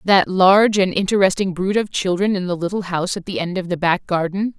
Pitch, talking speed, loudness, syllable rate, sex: 185 Hz, 235 wpm, -18 LUFS, 5.8 syllables/s, female